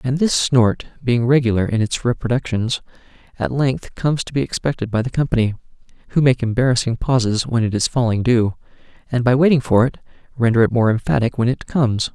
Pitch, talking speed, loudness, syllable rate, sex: 120 Hz, 190 wpm, -18 LUFS, 6.0 syllables/s, male